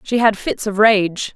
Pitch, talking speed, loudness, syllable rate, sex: 210 Hz, 220 wpm, -16 LUFS, 4.0 syllables/s, female